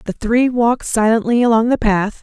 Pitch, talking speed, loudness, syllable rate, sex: 230 Hz, 190 wpm, -15 LUFS, 5.3 syllables/s, female